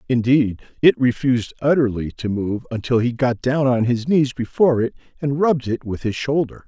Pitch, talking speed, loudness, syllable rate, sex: 125 Hz, 190 wpm, -20 LUFS, 5.3 syllables/s, male